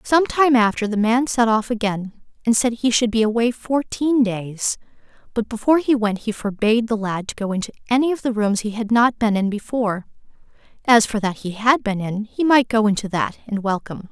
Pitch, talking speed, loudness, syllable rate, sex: 225 Hz, 215 wpm, -20 LUFS, 5.4 syllables/s, female